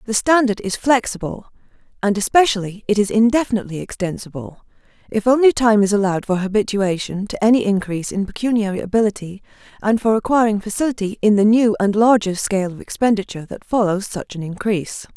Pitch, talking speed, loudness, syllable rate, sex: 210 Hz, 160 wpm, -18 LUFS, 6.1 syllables/s, female